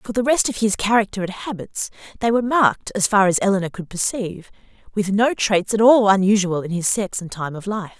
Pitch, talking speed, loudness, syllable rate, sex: 205 Hz, 225 wpm, -19 LUFS, 5.8 syllables/s, female